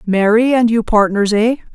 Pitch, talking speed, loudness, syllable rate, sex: 220 Hz, 135 wpm, -14 LUFS, 4.7 syllables/s, female